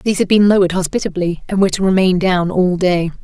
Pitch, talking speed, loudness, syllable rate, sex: 185 Hz, 220 wpm, -15 LUFS, 6.7 syllables/s, female